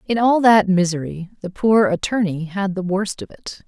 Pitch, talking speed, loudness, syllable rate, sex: 195 Hz, 195 wpm, -18 LUFS, 4.7 syllables/s, female